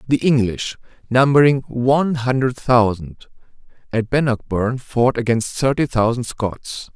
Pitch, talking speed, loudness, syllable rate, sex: 125 Hz, 110 wpm, -18 LUFS, 4.1 syllables/s, male